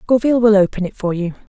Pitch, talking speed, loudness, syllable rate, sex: 205 Hz, 230 wpm, -16 LUFS, 7.3 syllables/s, female